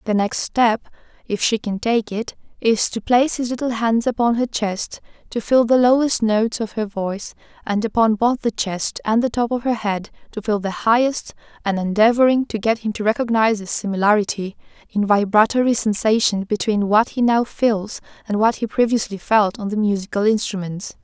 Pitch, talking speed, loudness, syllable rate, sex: 220 Hz, 190 wpm, -19 LUFS, 5.2 syllables/s, female